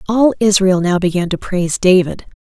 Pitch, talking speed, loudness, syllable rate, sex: 190 Hz, 175 wpm, -14 LUFS, 5.4 syllables/s, female